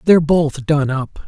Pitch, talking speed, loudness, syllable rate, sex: 150 Hz, 190 wpm, -16 LUFS, 4.5 syllables/s, male